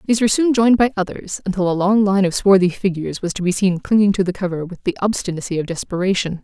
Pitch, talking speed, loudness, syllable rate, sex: 190 Hz, 240 wpm, -18 LUFS, 6.9 syllables/s, female